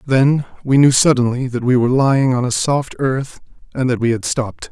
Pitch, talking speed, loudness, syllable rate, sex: 125 Hz, 215 wpm, -16 LUFS, 5.5 syllables/s, male